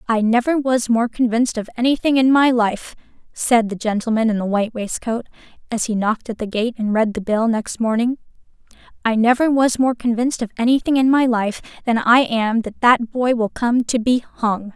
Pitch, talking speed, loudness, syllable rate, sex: 235 Hz, 205 wpm, -18 LUFS, 5.4 syllables/s, female